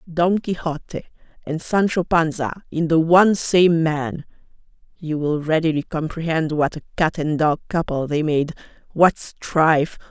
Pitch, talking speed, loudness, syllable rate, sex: 160 Hz, 140 wpm, -20 LUFS, 4.3 syllables/s, female